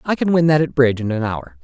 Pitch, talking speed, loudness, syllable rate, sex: 135 Hz, 330 wpm, -17 LUFS, 6.7 syllables/s, male